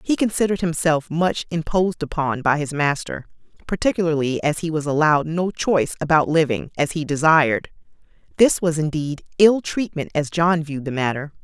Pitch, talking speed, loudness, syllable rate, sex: 160 Hz, 165 wpm, -20 LUFS, 5.4 syllables/s, female